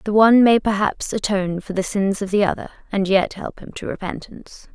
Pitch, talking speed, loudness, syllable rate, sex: 200 Hz, 215 wpm, -19 LUFS, 5.8 syllables/s, female